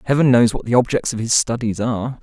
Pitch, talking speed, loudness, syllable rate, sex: 120 Hz, 245 wpm, -17 LUFS, 6.4 syllables/s, male